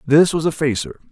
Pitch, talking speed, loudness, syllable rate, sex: 150 Hz, 215 wpm, -18 LUFS, 5.6 syllables/s, male